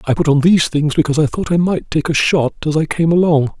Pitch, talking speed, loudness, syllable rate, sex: 155 Hz, 285 wpm, -15 LUFS, 6.3 syllables/s, male